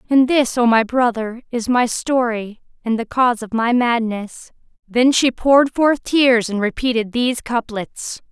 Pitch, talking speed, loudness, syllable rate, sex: 240 Hz, 165 wpm, -17 LUFS, 4.3 syllables/s, female